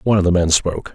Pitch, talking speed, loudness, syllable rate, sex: 90 Hz, 320 wpm, -16 LUFS, 8.2 syllables/s, male